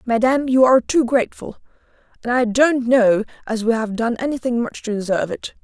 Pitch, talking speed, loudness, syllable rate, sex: 240 Hz, 190 wpm, -18 LUFS, 5.9 syllables/s, female